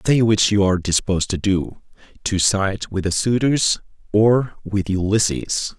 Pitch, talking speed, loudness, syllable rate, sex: 100 Hz, 145 wpm, -19 LUFS, 4.4 syllables/s, male